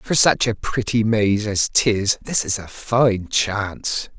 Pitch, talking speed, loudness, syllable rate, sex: 110 Hz, 170 wpm, -19 LUFS, 3.5 syllables/s, male